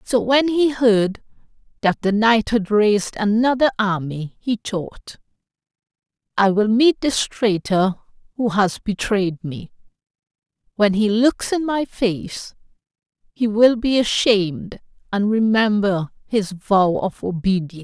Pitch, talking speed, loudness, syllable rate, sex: 210 Hz, 130 wpm, -19 LUFS, 3.9 syllables/s, female